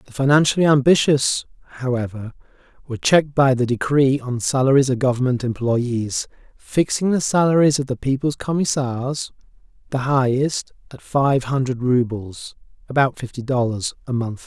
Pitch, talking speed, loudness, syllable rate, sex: 130 Hz, 125 wpm, -19 LUFS, 4.7 syllables/s, male